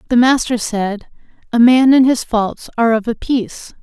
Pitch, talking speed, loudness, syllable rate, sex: 235 Hz, 190 wpm, -14 LUFS, 4.9 syllables/s, female